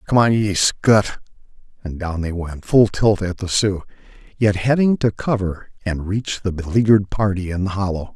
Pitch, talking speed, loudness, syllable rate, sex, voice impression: 100 Hz, 185 wpm, -19 LUFS, 4.8 syllables/s, male, masculine, adult-like, tensed, powerful, slightly weak, muffled, cool, slightly intellectual, calm, mature, friendly, reassuring, wild, lively, kind